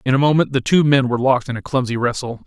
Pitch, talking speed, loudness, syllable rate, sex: 130 Hz, 290 wpm, -17 LUFS, 7.2 syllables/s, male